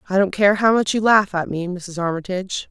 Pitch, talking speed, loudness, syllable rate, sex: 190 Hz, 245 wpm, -19 LUFS, 5.6 syllables/s, female